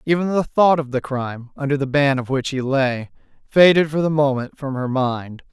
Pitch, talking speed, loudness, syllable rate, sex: 140 Hz, 215 wpm, -19 LUFS, 5.0 syllables/s, male